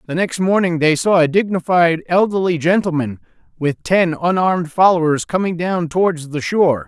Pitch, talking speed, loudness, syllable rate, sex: 170 Hz, 155 wpm, -16 LUFS, 5.2 syllables/s, male